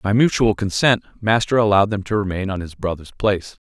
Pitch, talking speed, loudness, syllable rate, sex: 100 Hz, 195 wpm, -19 LUFS, 6.0 syllables/s, male